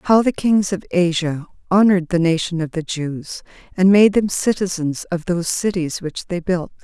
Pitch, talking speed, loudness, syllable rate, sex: 180 Hz, 185 wpm, -18 LUFS, 4.8 syllables/s, female